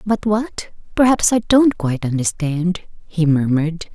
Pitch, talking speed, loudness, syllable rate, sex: 185 Hz, 120 wpm, -17 LUFS, 4.4 syllables/s, female